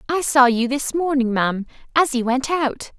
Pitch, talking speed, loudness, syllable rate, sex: 265 Hz, 200 wpm, -19 LUFS, 5.1 syllables/s, female